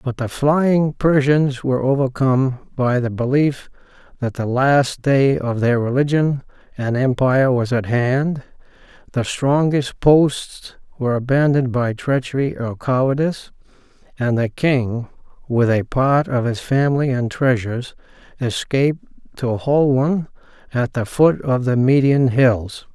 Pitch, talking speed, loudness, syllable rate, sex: 130 Hz, 135 wpm, -18 LUFS, 4.2 syllables/s, male